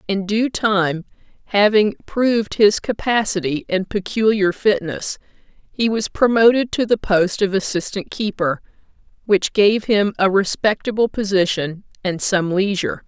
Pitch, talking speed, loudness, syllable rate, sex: 200 Hz, 130 wpm, -18 LUFS, 4.4 syllables/s, female